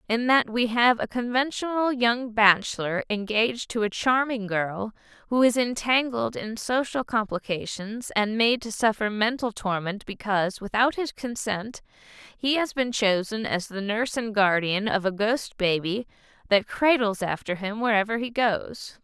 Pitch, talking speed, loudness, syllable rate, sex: 220 Hz, 155 wpm, -25 LUFS, 4.5 syllables/s, female